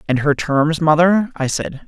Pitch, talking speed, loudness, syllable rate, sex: 160 Hz, 190 wpm, -16 LUFS, 4.2 syllables/s, male